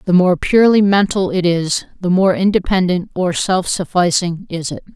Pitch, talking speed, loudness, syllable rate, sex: 180 Hz, 170 wpm, -15 LUFS, 4.8 syllables/s, female